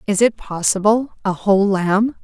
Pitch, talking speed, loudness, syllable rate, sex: 205 Hz, 160 wpm, -17 LUFS, 4.7 syllables/s, female